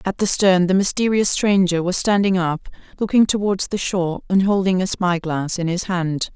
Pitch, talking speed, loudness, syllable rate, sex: 185 Hz, 200 wpm, -19 LUFS, 5.0 syllables/s, female